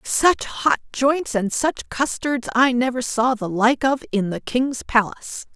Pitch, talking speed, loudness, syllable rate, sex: 250 Hz, 175 wpm, -20 LUFS, 3.9 syllables/s, female